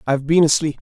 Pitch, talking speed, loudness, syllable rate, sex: 150 Hz, 205 wpm, -17 LUFS, 7.4 syllables/s, male